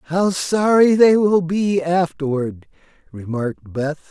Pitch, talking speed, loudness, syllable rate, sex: 170 Hz, 115 wpm, -18 LUFS, 3.6 syllables/s, male